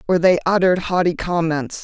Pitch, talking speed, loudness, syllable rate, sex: 175 Hz, 165 wpm, -18 LUFS, 5.6 syllables/s, female